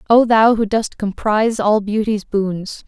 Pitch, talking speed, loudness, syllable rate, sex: 210 Hz, 165 wpm, -17 LUFS, 4.1 syllables/s, female